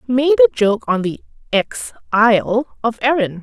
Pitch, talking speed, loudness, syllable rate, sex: 235 Hz, 160 wpm, -16 LUFS, 4.6 syllables/s, female